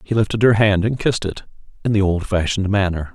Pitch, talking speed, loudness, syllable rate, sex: 100 Hz, 210 wpm, -18 LUFS, 6.3 syllables/s, male